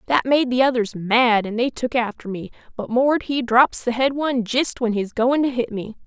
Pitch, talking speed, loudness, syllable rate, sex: 245 Hz, 235 wpm, -20 LUFS, 4.9 syllables/s, female